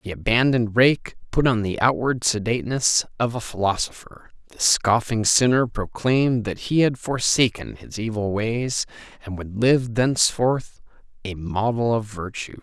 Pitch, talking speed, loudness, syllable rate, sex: 115 Hz, 145 wpm, -21 LUFS, 4.6 syllables/s, male